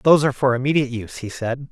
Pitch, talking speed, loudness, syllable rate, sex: 130 Hz, 245 wpm, -20 LUFS, 7.8 syllables/s, male